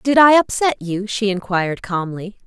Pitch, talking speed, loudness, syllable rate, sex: 210 Hz, 170 wpm, -17 LUFS, 4.7 syllables/s, female